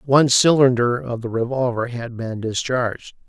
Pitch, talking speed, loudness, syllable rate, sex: 125 Hz, 145 wpm, -19 LUFS, 4.9 syllables/s, male